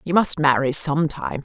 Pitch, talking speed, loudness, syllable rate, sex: 145 Hz, 165 wpm, -19 LUFS, 6.0 syllables/s, female